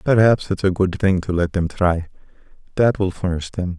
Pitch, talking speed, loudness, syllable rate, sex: 95 Hz, 190 wpm, -19 LUFS, 5.1 syllables/s, male